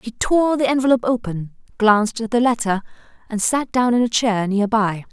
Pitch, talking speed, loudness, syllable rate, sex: 230 Hz, 200 wpm, -19 LUFS, 5.4 syllables/s, female